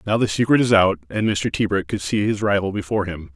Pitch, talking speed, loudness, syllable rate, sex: 100 Hz, 250 wpm, -20 LUFS, 6.2 syllables/s, male